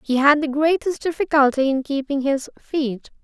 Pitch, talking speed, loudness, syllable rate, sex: 285 Hz, 165 wpm, -20 LUFS, 4.7 syllables/s, female